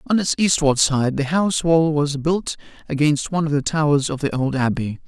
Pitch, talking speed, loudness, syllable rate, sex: 150 Hz, 215 wpm, -19 LUFS, 5.4 syllables/s, male